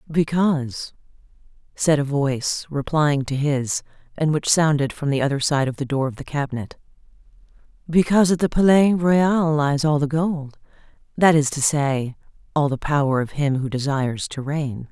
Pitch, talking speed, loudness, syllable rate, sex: 145 Hz, 165 wpm, -21 LUFS, 4.9 syllables/s, female